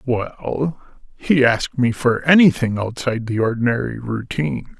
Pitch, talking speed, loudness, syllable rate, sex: 125 Hz, 125 wpm, -19 LUFS, 4.6 syllables/s, male